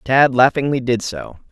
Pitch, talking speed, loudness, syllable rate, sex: 125 Hz, 160 wpm, -16 LUFS, 4.5 syllables/s, male